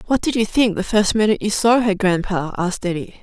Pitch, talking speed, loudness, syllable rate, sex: 205 Hz, 240 wpm, -18 LUFS, 5.9 syllables/s, female